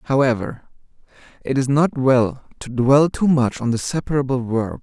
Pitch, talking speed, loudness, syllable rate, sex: 130 Hz, 160 wpm, -19 LUFS, 4.5 syllables/s, male